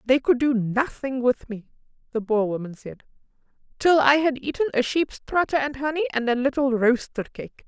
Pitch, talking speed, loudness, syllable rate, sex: 260 Hz, 190 wpm, -23 LUFS, 5.1 syllables/s, female